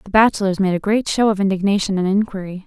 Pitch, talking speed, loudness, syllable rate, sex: 200 Hz, 225 wpm, -18 LUFS, 6.7 syllables/s, female